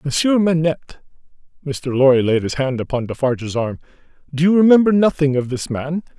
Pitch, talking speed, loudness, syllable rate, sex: 145 Hz, 165 wpm, -17 LUFS, 5.6 syllables/s, male